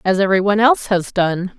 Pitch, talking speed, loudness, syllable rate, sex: 195 Hz, 190 wpm, -16 LUFS, 6.1 syllables/s, female